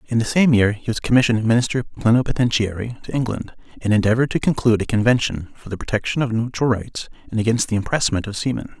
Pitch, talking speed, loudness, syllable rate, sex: 115 Hz, 200 wpm, -20 LUFS, 6.7 syllables/s, male